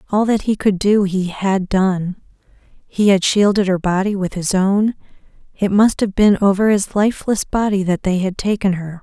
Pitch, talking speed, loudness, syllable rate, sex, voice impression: 195 Hz, 195 wpm, -17 LUFS, 4.7 syllables/s, female, feminine, adult-like, tensed, slightly dark, soft, slightly halting, slightly raspy, calm, elegant, kind, modest